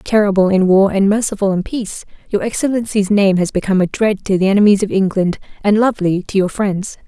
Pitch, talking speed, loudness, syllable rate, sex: 200 Hz, 205 wpm, -15 LUFS, 6.0 syllables/s, female